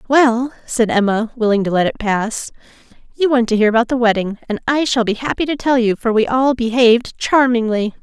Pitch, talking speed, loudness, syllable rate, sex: 235 Hz, 200 wpm, -16 LUFS, 5.5 syllables/s, female